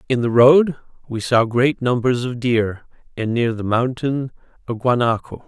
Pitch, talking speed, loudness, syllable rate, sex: 125 Hz, 165 wpm, -18 LUFS, 4.4 syllables/s, male